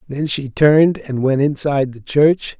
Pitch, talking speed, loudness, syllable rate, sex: 145 Hz, 185 wpm, -16 LUFS, 4.5 syllables/s, male